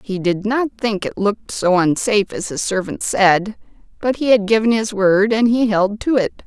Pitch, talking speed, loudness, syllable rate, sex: 210 Hz, 215 wpm, -17 LUFS, 4.7 syllables/s, female